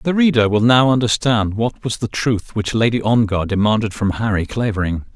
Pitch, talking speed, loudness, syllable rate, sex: 110 Hz, 185 wpm, -17 LUFS, 5.3 syllables/s, male